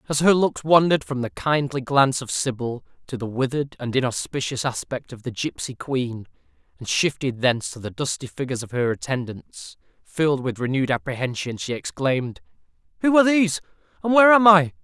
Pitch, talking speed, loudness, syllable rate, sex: 135 Hz, 175 wpm, -22 LUFS, 5.8 syllables/s, male